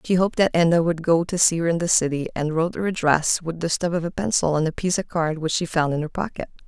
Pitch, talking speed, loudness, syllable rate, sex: 170 Hz, 295 wpm, -22 LUFS, 6.5 syllables/s, female